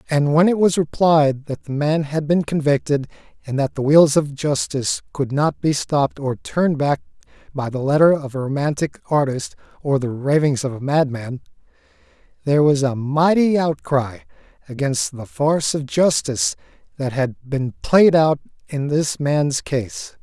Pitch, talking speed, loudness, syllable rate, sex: 145 Hz, 165 wpm, -19 LUFS, 4.6 syllables/s, male